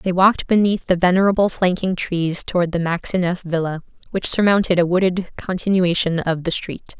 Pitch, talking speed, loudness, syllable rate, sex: 180 Hz, 165 wpm, -19 LUFS, 5.4 syllables/s, female